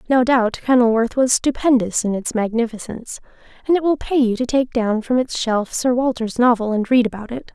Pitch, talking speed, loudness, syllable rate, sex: 240 Hz, 205 wpm, -18 LUFS, 5.4 syllables/s, female